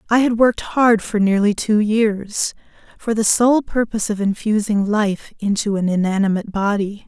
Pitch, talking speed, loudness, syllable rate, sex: 210 Hz, 160 wpm, -18 LUFS, 4.9 syllables/s, female